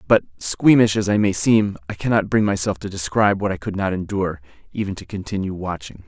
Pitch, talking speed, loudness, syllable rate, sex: 100 Hz, 205 wpm, -20 LUFS, 6.0 syllables/s, male